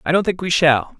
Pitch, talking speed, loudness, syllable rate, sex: 160 Hz, 300 wpm, -17 LUFS, 5.8 syllables/s, male